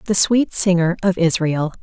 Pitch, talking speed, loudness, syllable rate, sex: 180 Hz, 165 wpm, -17 LUFS, 4.6 syllables/s, female